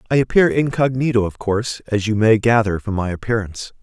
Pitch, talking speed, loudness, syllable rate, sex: 115 Hz, 190 wpm, -18 LUFS, 6.0 syllables/s, male